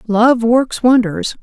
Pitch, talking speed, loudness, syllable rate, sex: 230 Hz, 125 wpm, -13 LUFS, 3.2 syllables/s, female